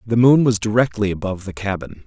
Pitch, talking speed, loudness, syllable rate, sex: 105 Hz, 205 wpm, -18 LUFS, 6.1 syllables/s, male